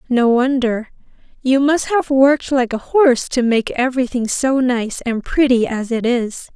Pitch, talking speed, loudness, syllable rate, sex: 255 Hz, 175 wpm, -16 LUFS, 4.5 syllables/s, female